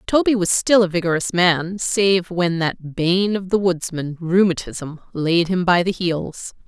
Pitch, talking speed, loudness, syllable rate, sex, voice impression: 180 Hz, 170 wpm, -19 LUFS, 4.0 syllables/s, female, feminine, adult-like, clear, intellectual, slightly elegant, slightly strict